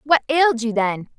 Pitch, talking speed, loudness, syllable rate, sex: 255 Hz, 200 wpm, -19 LUFS, 5.2 syllables/s, female